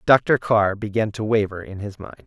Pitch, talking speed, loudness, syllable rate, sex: 105 Hz, 210 wpm, -21 LUFS, 4.9 syllables/s, male